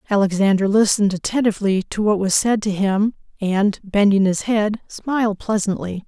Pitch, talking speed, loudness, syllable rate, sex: 205 Hz, 150 wpm, -19 LUFS, 5.1 syllables/s, female